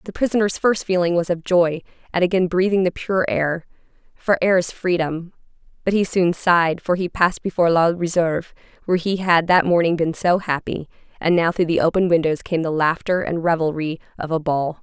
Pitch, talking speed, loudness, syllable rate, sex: 175 Hz, 195 wpm, -20 LUFS, 5.5 syllables/s, female